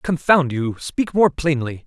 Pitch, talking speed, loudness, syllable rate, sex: 150 Hz, 160 wpm, -19 LUFS, 3.9 syllables/s, male